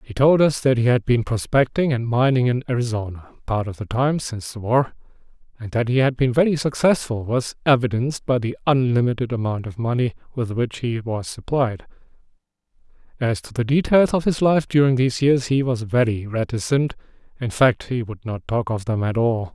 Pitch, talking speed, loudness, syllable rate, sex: 120 Hz, 195 wpm, -21 LUFS, 5.4 syllables/s, male